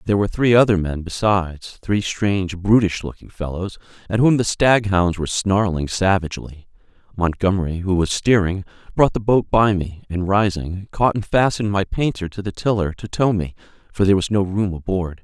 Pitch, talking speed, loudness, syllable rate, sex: 95 Hz, 175 wpm, -19 LUFS, 5.3 syllables/s, male